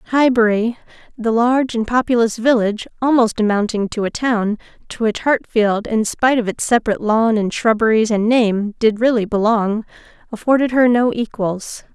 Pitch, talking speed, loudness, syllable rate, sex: 225 Hz, 155 wpm, -17 LUFS, 5.0 syllables/s, female